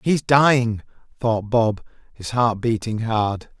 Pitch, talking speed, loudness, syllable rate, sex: 115 Hz, 135 wpm, -20 LUFS, 3.6 syllables/s, male